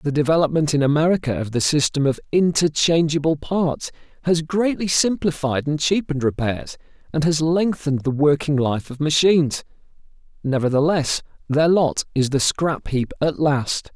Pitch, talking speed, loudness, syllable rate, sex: 150 Hz, 140 wpm, -20 LUFS, 4.9 syllables/s, male